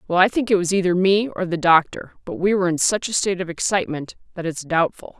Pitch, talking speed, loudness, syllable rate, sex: 185 Hz, 255 wpm, -20 LUFS, 6.4 syllables/s, female